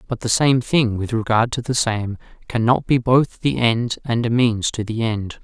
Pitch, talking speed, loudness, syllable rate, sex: 115 Hz, 220 wpm, -19 LUFS, 4.5 syllables/s, male